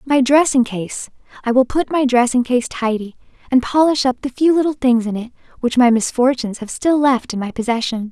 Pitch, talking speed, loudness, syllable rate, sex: 255 Hz, 200 wpm, -17 LUFS, 5.4 syllables/s, female